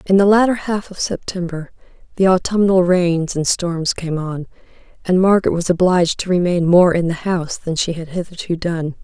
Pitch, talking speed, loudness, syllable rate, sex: 175 Hz, 185 wpm, -17 LUFS, 5.2 syllables/s, female